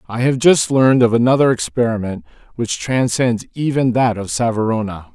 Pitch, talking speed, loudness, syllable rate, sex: 115 Hz, 150 wpm, -16 LUFS, 5.3 syllables/s, male